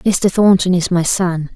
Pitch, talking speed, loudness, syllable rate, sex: 180 Hz, 195 wpm, -14 LUFS, 4.0 syllables/s, female